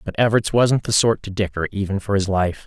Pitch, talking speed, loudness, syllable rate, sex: 100 Hz, 250 wpm, -20 LUFS, 5.5 syllables/s, male